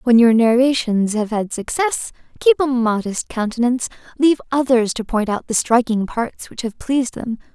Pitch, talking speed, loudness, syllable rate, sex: 240 Hz, 175 wpm, -18 LUFS, 5.0 syllables/s, female